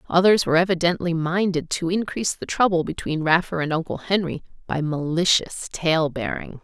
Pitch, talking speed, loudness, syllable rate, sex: 170 Hz, 155 wpm, -22 LUFS, 5.4 syllables/s, female